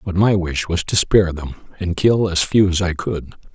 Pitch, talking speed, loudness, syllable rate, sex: 90 Hz, 235 wpm, -18 LUFS, 5.2 syllables/s, male